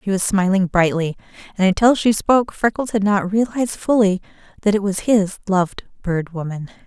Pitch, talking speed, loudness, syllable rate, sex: 200 Hz, 175 wpm, -18 LUFS, 5.4 syllables/s, female